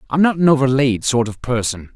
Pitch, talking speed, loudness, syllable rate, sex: 130 Hz, 215 wpm, -17 LUFS, 5.7 syllables/s, male